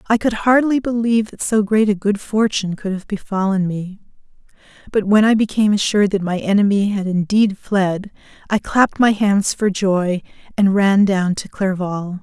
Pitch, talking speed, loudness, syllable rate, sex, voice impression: 200 Hz, 175 wpm, -17 LUFS, 5.0 syllables/s, female, feminine, adult-like, relaxed, slightly weak, soft, fluent, intellectual, calm, friendly, elegant, kind, modest